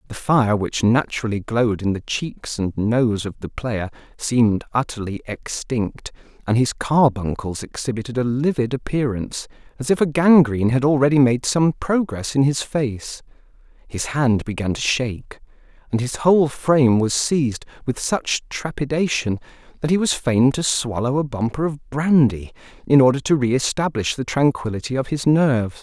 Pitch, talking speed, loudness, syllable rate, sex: 130 Hz, 160 wpm, -20 LUFS, 4.9 syllables/s, male